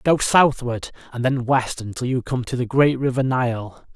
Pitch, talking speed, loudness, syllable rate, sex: 125 Hz, 195 wpm, -21 LUFS, 4.5 syllables/s, male